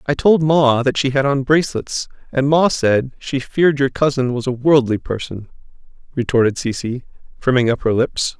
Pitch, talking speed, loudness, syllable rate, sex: 135 Hz, 180 wpm, -17 LUFS, 5.0 syllables/s, male